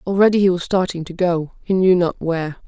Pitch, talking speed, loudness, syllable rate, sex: 180 Hz, 225 wpm, -18 LUFS, 5.7 syllables/s, female